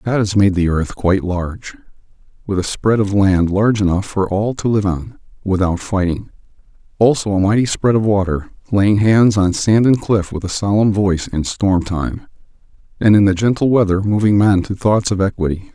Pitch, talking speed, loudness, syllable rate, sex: 100 Hz, 195 wpm, -16 LUFS, 5.1 syllables/s, male